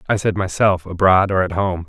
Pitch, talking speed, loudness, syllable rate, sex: 95 Hz, 225 wpm, -17 LUFS, 5.3 syllables/s, male